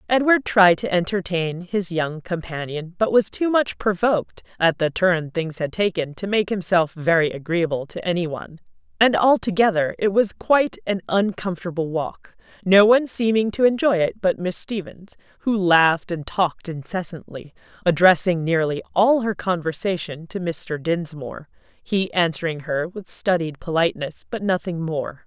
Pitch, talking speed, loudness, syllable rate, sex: 180 Hz, 155 wpm, -21 LUFS, 4.8 syllables/s, female